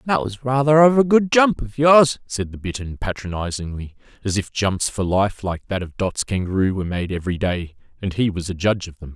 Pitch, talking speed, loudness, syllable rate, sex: 110 Hz, 215 wpm, -20 LUFS, 5.5 syllables/s, male